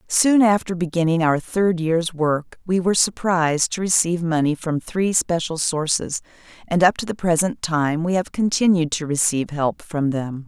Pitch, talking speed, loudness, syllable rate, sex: 170 Hz, 180 wpm, -20 LUFS, 4.8 syllables/s, female